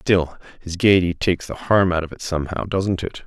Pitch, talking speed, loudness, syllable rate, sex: 90 Hz, 220 wpm, -20 LUFS, 5.5 syllables/s, male